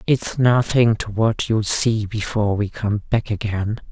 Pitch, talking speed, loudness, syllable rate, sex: 110 Hz, 170 wpm, -20 LUFS, 4.2 syllables/s, female